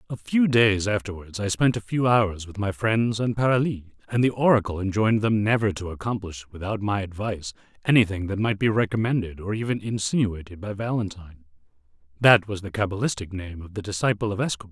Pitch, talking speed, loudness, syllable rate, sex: 105 Hz, 185 wpm, -24 LUFS, 6.0 syllables/s, male